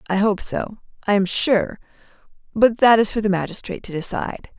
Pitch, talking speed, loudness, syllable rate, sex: 205 Hz, 170 wpm, -20 LUFS, 5.5 syllables/s, female